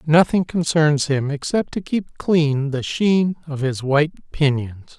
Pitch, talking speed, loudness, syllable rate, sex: 150 Hz, 155 wpm, -20 LUFS, 3.8 syllables/s, male